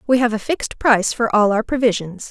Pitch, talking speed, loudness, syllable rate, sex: 225 Hz, 235 wpm, -18 LUFS, 6.1 syllables/s, female